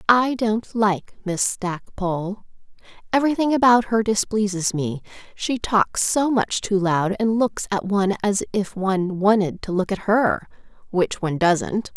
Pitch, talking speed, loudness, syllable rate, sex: 205 Hz, 145 wpm, -21 LUFS, 4.3 syllables/s, female